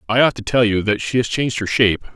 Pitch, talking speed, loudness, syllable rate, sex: 115 Hz, 305 wpm, -18 LUFS, 7.0 syllables/s, male